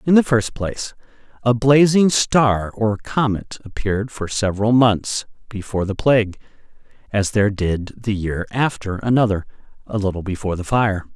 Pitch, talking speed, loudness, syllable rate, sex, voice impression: 110 Hz, 150 wpm, -19 LUFS, 5.0 syllables/s, male, masculine, adult-like, cool, slightly refreshing, sincere, slightly elegant